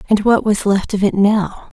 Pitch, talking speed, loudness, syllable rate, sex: 205 Hz, 235 wpm, -15 LUFS, 4.6 syllables/s, female